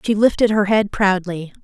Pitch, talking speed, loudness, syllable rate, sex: 200 Hz, 185 wpm, -17 LUFS, 5.0 syllables/s, female